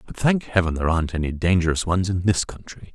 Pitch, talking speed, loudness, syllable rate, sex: 90 Hz, 225 wpm, -22 LUFS, 6.4 syllables/s, male